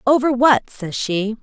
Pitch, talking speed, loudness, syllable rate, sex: 240 Hz, 170 wpm, -18 LUFS, 4.0 syllables/s, female